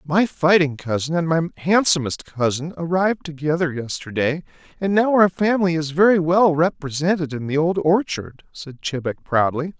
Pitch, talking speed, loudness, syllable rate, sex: 160 Hz, 155 wpm, -20 LUFS, 4.9 syllables/s, male